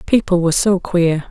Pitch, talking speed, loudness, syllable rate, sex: 180 Hz, 185 wpm, -16 LUFS, 5.1 syllables/s, female